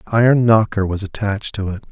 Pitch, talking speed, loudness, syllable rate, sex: 105 Hz, 220 wpm, -17 LUFS, 6.3 syllables/s, male